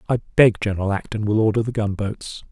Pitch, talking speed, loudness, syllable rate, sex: 105 Hz, 215 wpm, -20 LUFS, 5.7 syllables/s, male